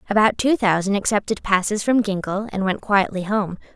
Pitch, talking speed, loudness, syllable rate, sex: 205 Hz, 175 wpm, -20 LUFS, 5.3 syllables/s, female